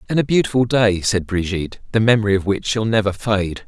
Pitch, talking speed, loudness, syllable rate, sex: 105 Hz, 210 wpm, -18 LUFS, 5.9 syllables/s, male